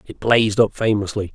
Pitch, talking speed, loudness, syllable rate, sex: 105 Hz, 180 wpm, -18 LUFS, 5.7 syllables/s, male